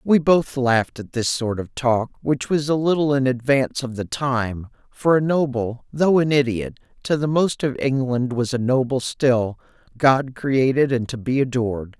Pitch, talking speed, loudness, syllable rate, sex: 130 Hz, 190 wpm, -21 LUFS, 4.5 syllables/s, male